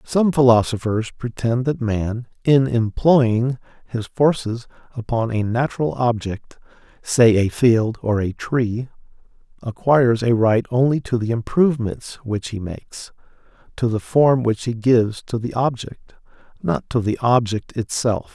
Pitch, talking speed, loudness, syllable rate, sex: 120 Hz, 135 wpm, -19 LUFS, 4.3 syllables/s, male